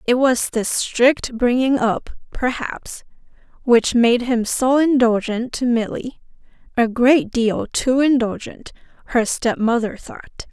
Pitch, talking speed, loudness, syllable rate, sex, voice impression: 245 Hz, 125 wpm, -18 LUFS, 3.8 syllables/s, female, feminine, slightly young, slightly adult-like, thin, slightly dark, slightly soft, clear, fluent, cute, slightly intellectual, refreshing, sincere, slightly calm, slightly friendly, reassuring, slightly unique, wild, slightly sweet, very lively, slightly modest